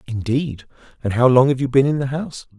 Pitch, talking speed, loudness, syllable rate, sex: 130 Hz, 230 wpm, -18 LUFS, 6.1 syllables/s, male